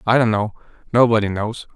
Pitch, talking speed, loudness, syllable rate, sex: 110 Hz, 170 wpm, -19 LUFS, 5.5 syllables/s, male